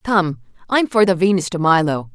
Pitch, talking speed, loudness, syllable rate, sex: 180 Hz, 195 wpm, -17 LUFS, 5.1 syllables/s, female